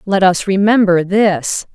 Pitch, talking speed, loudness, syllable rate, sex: 190 Hz, 135 wpm, -13 LUFS, 3.8 syllables/s, female